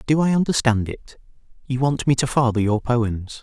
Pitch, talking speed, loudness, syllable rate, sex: 125 Hz, 175 wpm, -20 LUFS, 5.0 syllables/s, male